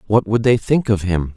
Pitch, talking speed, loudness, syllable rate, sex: 110 Hz, 265 wpm, -17 LUFS, 5.0 syllables/s, male